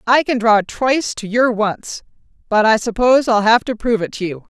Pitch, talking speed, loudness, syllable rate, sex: 225 Hz, 220 wpm, -16 LUFS, 5.4 syllables/s, female